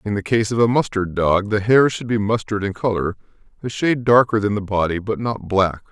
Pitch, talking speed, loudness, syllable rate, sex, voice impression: 105 Hz, 235 wpm, -19 LUFS, 5.5 syllables/s, male, very masculine, very adult-like, slightly old, very thick, very tensed, very powerful, bright, hard, very clear, fluent, slightly raspy, very cool, very intellectual, very sincere, very calm, very mature, very friendly, very reassuring, unique, slightly elegant, very wild, sweet, very lively, kind